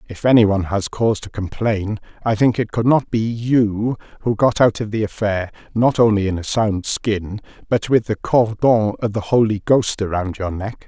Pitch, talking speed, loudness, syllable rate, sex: 110 Hz, 205 wpm, -18 LUFS, 4.8 syllables/s, male